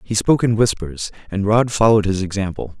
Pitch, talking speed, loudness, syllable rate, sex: 105 Hz, 195 wpm, -18 LUFS, 6.0 syllables/s, male